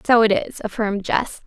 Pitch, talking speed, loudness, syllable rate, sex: 215 Hz, 205 wpm, -20 LUFS, 5.3 syllables/s, female